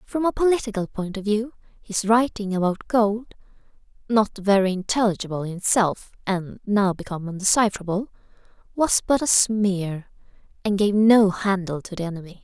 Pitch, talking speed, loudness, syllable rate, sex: 205 Hz, 145 wpm, -22 LUFS, 5.2 syllables/s, female